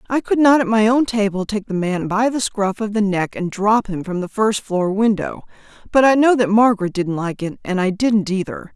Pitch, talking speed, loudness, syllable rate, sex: 210 Hz, 240 wpm, -18 LUFS, 5.1 syllables/s, female